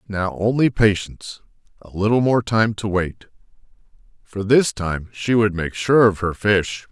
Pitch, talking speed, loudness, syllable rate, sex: 105 Hz, 165 wpm, -19 LUFS, 4.4 syllables/s, male